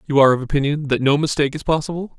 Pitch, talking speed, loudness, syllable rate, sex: 145 Hz, 245 wpm, -19 LUFS, 7.8 syllables/s, male